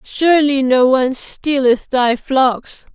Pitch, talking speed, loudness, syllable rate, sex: 265 Hz, 120 wpm, -14 LUFS, 3.6 syllables/s, female